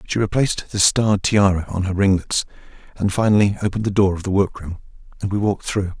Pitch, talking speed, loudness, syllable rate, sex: 100 Hz, 200 wpm, -19 LUFS, 6.5 syllables/s, male